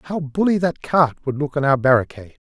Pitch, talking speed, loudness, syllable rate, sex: 145 Hz, 220 wpm, -19 LUFS, 5.7 syllables/s, male